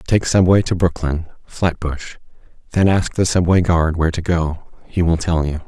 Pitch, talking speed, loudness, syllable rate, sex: 85 Hz, 180 wpm, -18 LUFS, 5.1 syllables/s, male